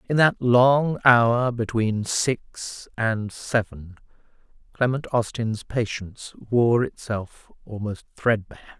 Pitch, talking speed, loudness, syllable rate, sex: 115 Hz, 100 wpm, -23 LUFS, 3.5 syllables/s, male